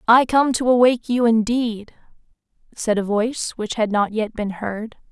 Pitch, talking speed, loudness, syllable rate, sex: 225 Hz, 175 wpm, -20 LUFS, 4.7 syllables/s, female